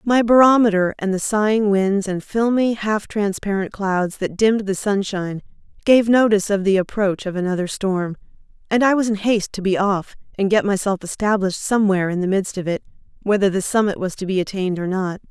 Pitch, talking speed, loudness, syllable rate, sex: 200 Hz, 195 wpm, -19 LUFS, 5.7 syllables/s, female